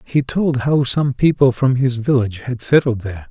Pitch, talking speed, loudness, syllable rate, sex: 130 Hz, 200 wpm, -17 LUFS, 5.0 syllables/s, male